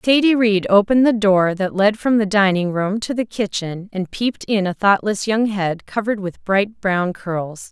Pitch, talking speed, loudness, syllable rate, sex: 200 Hz, 200 wpm, -18 LUFS, 4.6 syllables/s, female